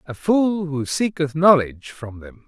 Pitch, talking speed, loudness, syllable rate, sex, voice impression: 150 Hz, 170 wpm, -19 LUFS, 4.3 syllables/s, male, masculine, adult-like, tensed, powerful, slightly bright, clear, slightly halting, slightly mature, friendly, wild, lively, intense